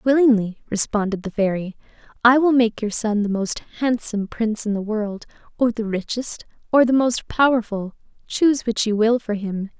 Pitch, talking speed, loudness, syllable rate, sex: 225 Hz, 180 wpm, -20 LUFS, 5.1 syllables/s, female